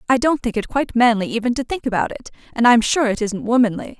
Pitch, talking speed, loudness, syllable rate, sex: 235 Hz, 255 wpm, -18 LUFS, 6.5 syllables/s, female